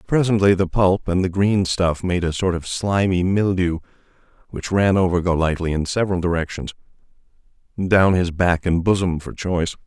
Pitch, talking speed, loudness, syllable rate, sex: 90 Hz, 160 wpm, -20 LUFS, 5.1 syllables/s, male